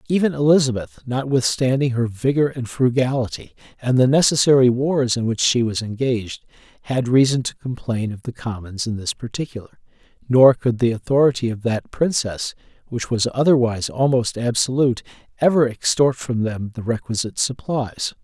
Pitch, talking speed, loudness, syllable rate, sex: 125 Hz, 150 wpm, -20 LUFS, 5.2 syllables/s, male